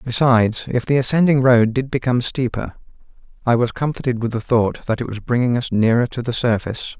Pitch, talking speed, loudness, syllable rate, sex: 120 Hz, 195 wpm, -18 LUFS, 5.9 syllables/s, male